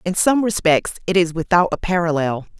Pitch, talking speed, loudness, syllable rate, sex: 175 Hz, 185 wpm, -18 LUFS, 5.3 syllables/s, female